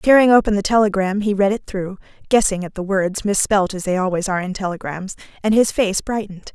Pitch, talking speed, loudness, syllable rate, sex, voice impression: 200 Hz, 210 wpm, -18 LUFS, 5.9 syllables/s, female, feminine, adult-like, tensed, powerful, clear, very fluent, intellectual, elegant, lively, slightly strict, sharp